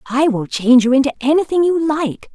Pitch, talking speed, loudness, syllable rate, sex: 275 Hz, 205 wpm, -15 LUFS, 5.6 syllables/s, female